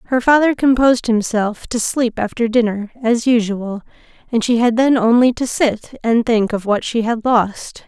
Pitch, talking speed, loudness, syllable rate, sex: 230 Hz, 185 wpm, -16 LUFS, 4.6 syllables/s, female